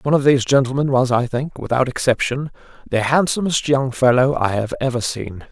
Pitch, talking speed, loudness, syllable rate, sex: 130 Hz, 185 wpm, -18 LUFS, 5.7 syllables/s, male